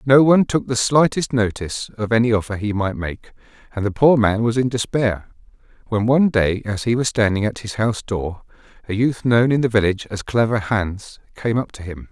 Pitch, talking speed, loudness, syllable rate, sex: 110 Hz, 215 wpm, -19 LUFS, 5.4 syllables/s, male